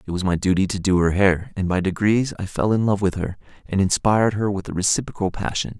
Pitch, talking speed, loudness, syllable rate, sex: 100 Hz, 250 wpm, -21 LUFS, 6.0 syllables/s, male